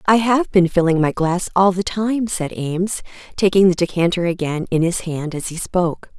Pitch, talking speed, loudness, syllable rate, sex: 180 Hz, 205 wpm, -18 LUFS, 5.0 syllables/s, female